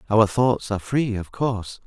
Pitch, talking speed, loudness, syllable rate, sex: 110 Hz, 195 wpm, -22 LUFS, 4.9 syllables/s, male